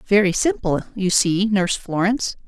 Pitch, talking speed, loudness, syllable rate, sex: 195 Hz, 145 wpm, -20 LUFS, 5.2 syllables/s, female